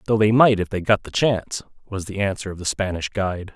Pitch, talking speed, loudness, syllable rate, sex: 100 Hz, 255 wpm, -21 LUFS, 6.1 syllables/s, male